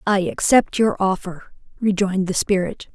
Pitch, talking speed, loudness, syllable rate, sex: 195 Hz, 145 wpm, -20 LUFS, 4.7 syllables/s, female